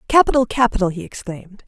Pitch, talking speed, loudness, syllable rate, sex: 215 Hz, 145 wpm, -18 LUFS, 6.7 syllables/s, female